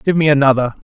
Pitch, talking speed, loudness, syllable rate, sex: 145 Hz, 200 wpm, -14 LUFS, 7.3 syllables/s, male